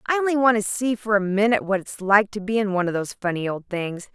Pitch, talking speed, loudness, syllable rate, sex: 205 Hz, 290 wpm, -22 LUFS, 6.6 syllables/s, female